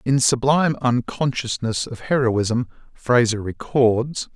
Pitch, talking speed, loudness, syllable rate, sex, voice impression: 125 Hz, 95 wpm, -20 LUFS, 3.9 syllables/s, male, masculine, adult-like, sincere, calm, slightly sweet